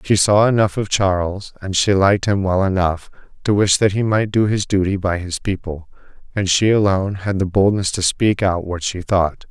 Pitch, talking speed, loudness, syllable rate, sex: 95 Hz, 215 wpm, -17 LUFS, 5.0 syllables/s, male